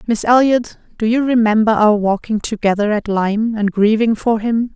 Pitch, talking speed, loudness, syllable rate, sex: 220 Hz, 175 wpm, -15 LUFS, 5.0 syllables/s, female